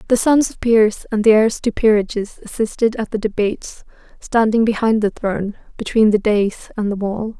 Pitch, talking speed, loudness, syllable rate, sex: 215 Hz, 185 wpm, -17 LUFS, 5.1 syllables/s, female